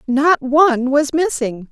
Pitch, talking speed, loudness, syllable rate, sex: 280 Hz, 140 wpm, -15 LUFS, 3.9 syllables/s, female